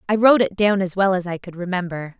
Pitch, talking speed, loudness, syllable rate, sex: 190 Hz, 275 wpm, -19 LUFS, 6.5 syllables/s, female